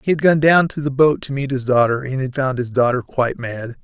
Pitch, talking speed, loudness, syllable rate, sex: 135 Hz, 280 wpm, -18 LUFS, 5.8 syllables/s, male